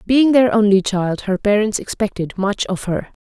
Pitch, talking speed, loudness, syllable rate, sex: 205 Hz, 185 wpm, -17 LUFS, 4.7 syllables/s, female